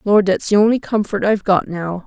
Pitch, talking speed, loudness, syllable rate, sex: 200 Hz, 230 wpm, -17 LUFS, 5.6 syllables/s, female